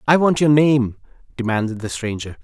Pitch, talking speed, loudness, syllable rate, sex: 130 Hz, 175 wpm, -18 LUFS, 5.4 syllables/s, male